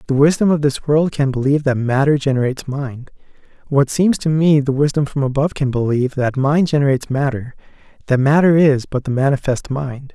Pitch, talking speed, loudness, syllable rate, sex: 140 Hz, 185 wpm, -17 LUFS, 5.8 syllables/s, male